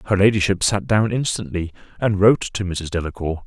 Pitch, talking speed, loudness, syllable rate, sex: 95 Hz, 175 wpm, -20 LUFS, 5.7 syllables/s, male